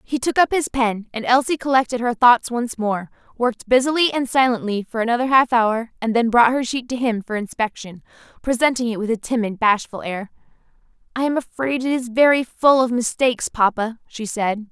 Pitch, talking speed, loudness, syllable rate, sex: 240 Hz, 195 wpm, -19 LUFS, 5.3 syllables/s, female